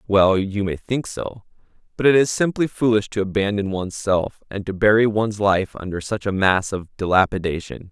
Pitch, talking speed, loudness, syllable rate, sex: 100 Hz, 190 wpm, -20 LUFS, 5.2 syllables/s, male